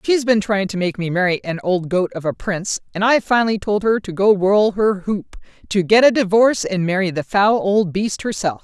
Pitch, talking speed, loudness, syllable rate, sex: 200 Hz, 230 wpm, -18 LUFS, 5.2 syllables/s, female